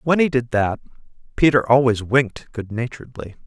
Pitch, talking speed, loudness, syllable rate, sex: 125 Hz, 155 wpm, -19 LUFS, 5.5 syllables/s, male